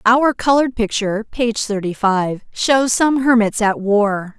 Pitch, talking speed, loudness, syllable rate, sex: 225 Hz, 150 wpm, -17 LUFS, 4.1 syllables/s, female